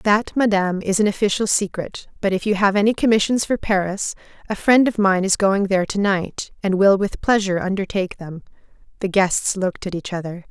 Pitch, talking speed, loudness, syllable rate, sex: 195 Hz, 200 wpm, -19 LUFS, 5.6 syllables/s, female